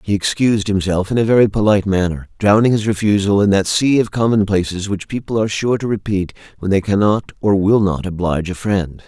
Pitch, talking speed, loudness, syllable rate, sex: 100 Hz, 205 wpm, -16 LUFS, 5.9 syllables/s, male